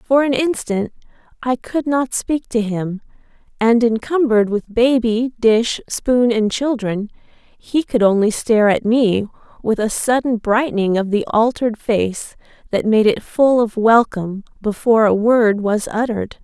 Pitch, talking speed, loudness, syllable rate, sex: 230 Hz, 155 wpm, -17 LUFS, 4.4 syllables/s, female